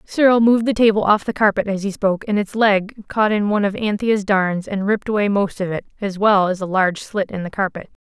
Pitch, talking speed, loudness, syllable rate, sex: 205 Hz, 255 wpm, -18 LUFS, 5.9 syllables/s, female